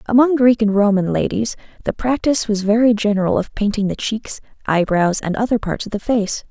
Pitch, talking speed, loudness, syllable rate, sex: 215 Hz, 195 wpm, -18 LUFS, 5.5 syllables/s, female